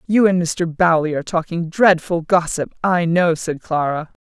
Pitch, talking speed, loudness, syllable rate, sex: 170 Hz, 170 wpm, -18 LUFS, 4.6 syllables/s, female